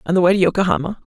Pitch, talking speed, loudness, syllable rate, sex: 170 Hz, 270 wpm, -17 LUFS, 8.4 syllables/s, male